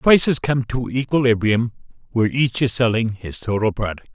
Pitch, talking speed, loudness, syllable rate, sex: 120 Hz, 160 wpm, -20 LUFS, 5.1 syllables/s, male